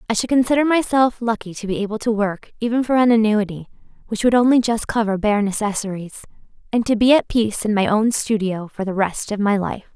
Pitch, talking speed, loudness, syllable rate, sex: 220 Hz, 215 wpm, -19 LUFS, 5.9 syllables/s, female